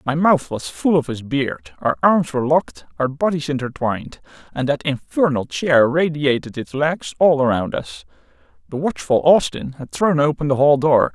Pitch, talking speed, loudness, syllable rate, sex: 135 Hz, 180 wpm, -19 LUFS, 4.7 syllables/s, male